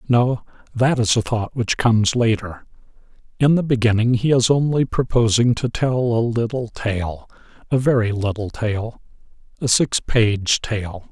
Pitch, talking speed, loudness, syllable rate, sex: 115 Hz, 145 wpm, -19 LUFS, 4.3 syllables/s, male